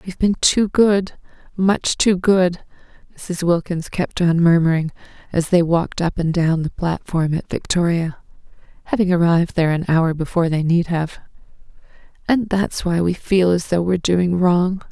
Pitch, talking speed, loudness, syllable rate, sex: 175 Hz, 160 wpm, -18 LUFS, 4.8 syllables/s, female